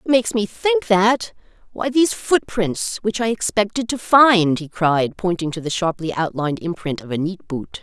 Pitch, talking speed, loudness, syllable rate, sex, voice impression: 190 Hz, 185 wpm, -19 LUFS, 4.8 syllables/s, female, slightly masculine, slightly feminine, very gender-neutral, slightly middle-aged, slightly thick, tensed, powerful, bright, hard, clear, fluent, slightly cool, slightly intellectual, refreshing, sincere, calm, slightly friendly, slightly reassuring, slightly unique, slightly elegant, slightly wild, slightly sweet, lively, slightly strict, slightly intense, sharp